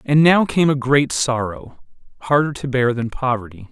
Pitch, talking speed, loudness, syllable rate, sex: 130 Hz, 180 wpm, -18 LUFS, 4.7 syllables/s, male